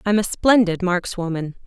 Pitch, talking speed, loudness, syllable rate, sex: 190 Hz, 145 wpm, -20 LUFS, 4.8 syllables/s, female